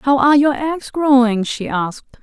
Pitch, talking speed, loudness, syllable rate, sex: 260 Hz, 190 wpm, -16 LUFS, 4.8 syllables/s, female